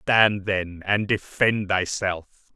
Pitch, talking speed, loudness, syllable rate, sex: 100 Hz, 115 wpm, -23 LUFS, 2.8 syllables/s, male